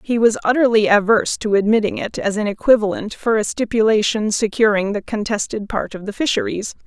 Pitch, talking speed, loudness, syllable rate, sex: 215 Hz, 175 wpm, -18 LUFS, 5.8 syllables/s, female